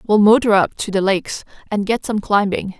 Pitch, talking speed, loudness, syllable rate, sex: 205 Hz, 215 wpm, -17 LUFS, 5.5 syllables/s, female